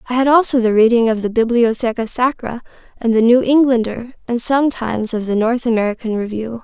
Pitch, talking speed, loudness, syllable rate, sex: 235 Hz, 180 wpm, -16 LUFS, 6.0 syllables/s, female